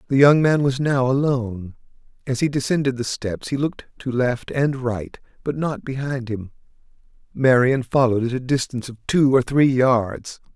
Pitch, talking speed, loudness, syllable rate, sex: 130 Hz, 175 wpm, -20 LUFS, 5.0 syllables/s, male